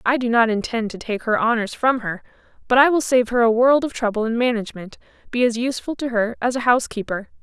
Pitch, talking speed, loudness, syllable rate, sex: 235 Hz, 225 wpm, -20 LUFS, 6.3 syllables/s, female